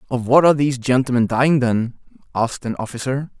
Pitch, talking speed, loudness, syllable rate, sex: 130 Hz, 175 wpm, -18 LUFS, 6.4 syllables/s, male